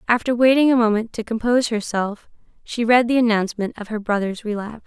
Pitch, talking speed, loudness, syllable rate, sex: 225 Hz, 185 wpm, -20 LUFS, 6.2 syllables/s, female